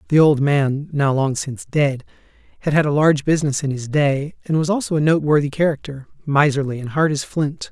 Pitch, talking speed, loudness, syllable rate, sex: 145 Hz, 200 wpm, -19 LUFS, 5.8 syllables/s, male